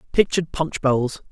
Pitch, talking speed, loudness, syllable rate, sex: 150 Hz, 135 wpm, -21 LUFS, 5.0 syllables/s, male